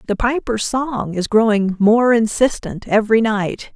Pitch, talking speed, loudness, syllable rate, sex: 225 Hz, 145 wpm, -17 LUFS, 4.2 syllables/s, female